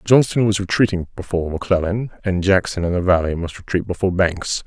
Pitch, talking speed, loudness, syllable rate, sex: 95 Hz, 180 wpm, -19 LUFS, 6.2 syllables/s, male